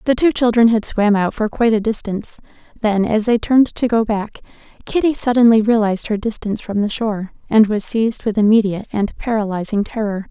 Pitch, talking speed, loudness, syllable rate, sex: 220 Hz, 190 wpm, -17 LUFS, 6.0 syllables/s, female